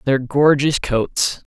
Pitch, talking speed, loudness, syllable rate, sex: 135 Hz, 120 wpm, -17 LUFS, 3.0 syllables/s, male